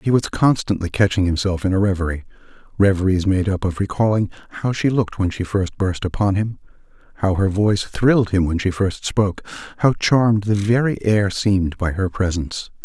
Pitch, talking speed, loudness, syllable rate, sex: 100 Hz, 180 wpm, -19 LUFS, 5.6 syllables/s, male